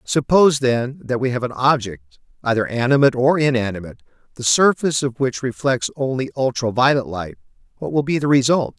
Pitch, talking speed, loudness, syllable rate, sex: 130 Hz, 170 wpm, -18 LUFS, 5.8 syllables/s, male